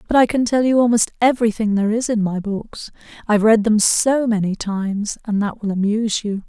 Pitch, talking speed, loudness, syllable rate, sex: 215 Hz, 215 wpm, -18 LUFS, 5.7 syllables/s, female